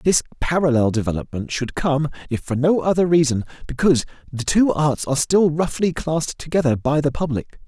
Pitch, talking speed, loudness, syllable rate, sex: 145 Hz, 170 wpm, -20 LUFS, 5.6 syllables/s, male